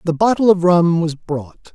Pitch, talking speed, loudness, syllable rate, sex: 175 Hz, 205 wpm, -16 LUFS, 4.4 syllables/s, male